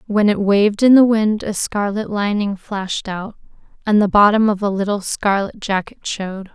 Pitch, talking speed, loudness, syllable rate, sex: 205 Hz, 185 wpm, -17 LUFS, 4.9 syllables/s, female